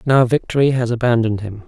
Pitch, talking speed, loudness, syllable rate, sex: 120 Hz, 180 wpm, -17 LUFS, 6.4 syllables/s, male